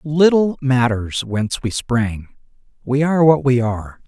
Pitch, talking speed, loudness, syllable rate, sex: 130 Hz, 145 wpm, -17 LUFS, 4.3 syllables/s, male